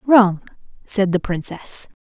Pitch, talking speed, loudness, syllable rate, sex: 195 Hz, 120 wpm, -19 LUFS, 3.6 syllables/s, female